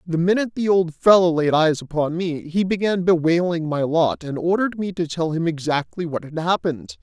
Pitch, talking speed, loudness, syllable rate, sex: 170 Hz, 205 wpm, -20 LUFS, 5.4 syllables/s, male